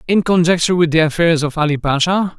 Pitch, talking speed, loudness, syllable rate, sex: 165 Hz, 200 wpm, -15 LUFS, 5.8 syllables/s, male